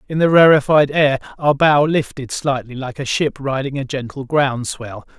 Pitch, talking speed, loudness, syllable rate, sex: 140 Hz, 185 wpm, -17 LUFS, 4.7 syllables/s, male